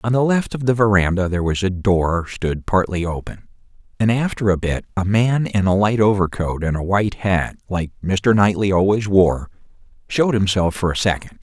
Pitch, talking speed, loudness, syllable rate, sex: 100 Hz, 195 wpm, -19 LUFS, 5.2 syllables/s, male